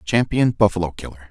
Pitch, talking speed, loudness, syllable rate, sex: 100 Hz, 140 wpm, -19 LUFS, 6.4 syllables/s, male